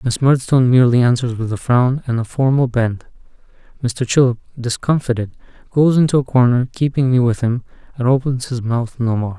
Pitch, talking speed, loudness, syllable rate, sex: 125 Hz, 180 wpm, -17 LUFS, 5.6 syllables/s, male